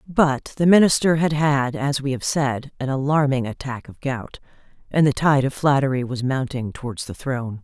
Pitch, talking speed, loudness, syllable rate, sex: 135 Hz, 190 wpm, -21 LUFS, 5.0 syllables/s, female